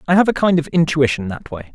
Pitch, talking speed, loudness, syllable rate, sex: 150 Hz, 275 wpm, -17 LUFS, 6.4 syllables/s, male